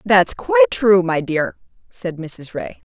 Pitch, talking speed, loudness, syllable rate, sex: 175 Hz, 160 wpm, -18 LUFS, 3.8 syllables/s, female